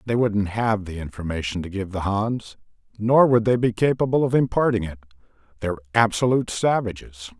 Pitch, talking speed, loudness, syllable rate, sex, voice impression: 105 Hz, 160 wpm, -22 LUFS, 5.5 syllables/s, male, masculine, middle-aged, tensed, slightly weak, soft, slightly raspy, cool, intellectual, sincere, calm, mature, friendly, reassuring, lively, slightly strict